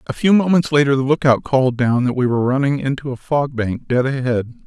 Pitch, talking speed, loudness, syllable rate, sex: 135 Hz, 230 wpm, -17 LUFS, 5.9 syllables/s, male